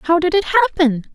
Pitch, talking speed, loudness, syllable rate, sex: 300 Hz, 210 wpm, -16 LUFS, 7.3 syllables/s, female